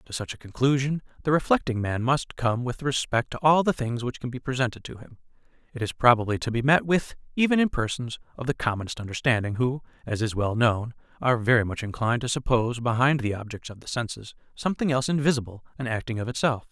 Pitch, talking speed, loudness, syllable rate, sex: 125 Hz, 210 wpm, -25 LUFS, 6.3 syllables/s, male